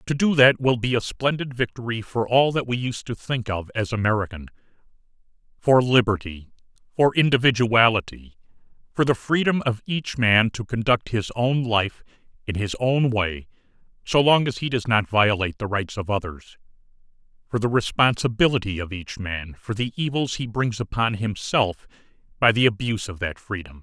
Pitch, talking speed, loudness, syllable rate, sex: 115 Hz, 165 wpm, -22 LUFS, 5.1 syllables/s, male